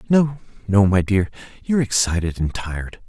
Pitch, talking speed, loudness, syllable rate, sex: 105 Hz, 155 wpm, -20 LUFS, 5.3 syllables/s, male